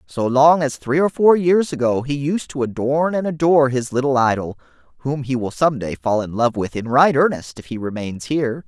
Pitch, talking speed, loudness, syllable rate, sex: 135 Hz, 230 wpm, -18 LUFS, 5.2 syllables/s, male